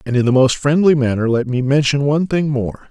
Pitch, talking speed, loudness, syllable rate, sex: 135 Hz, 250 wpm, -16 LUFS, 5.7 syllables/s, male